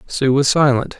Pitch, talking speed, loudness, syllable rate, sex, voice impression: 135 Hz, 180 wpm, -15 LUFS, 4.7 syllables/s, male, masculine, middle-aged, relaxed, slightly weak, slightly soft, raspy, calm, mature, friendly, reassuring, wild, kind, modest